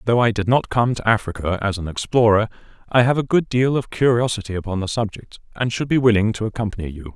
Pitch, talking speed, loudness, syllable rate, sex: 110 Hz, 225 wpm, -20 LUFS, 6.2 syllables/s, male